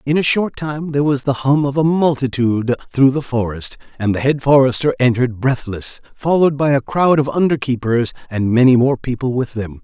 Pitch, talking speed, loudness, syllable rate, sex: 130 Hz, 200 wpm, -16 LUFS, 5.4 syllables/s, male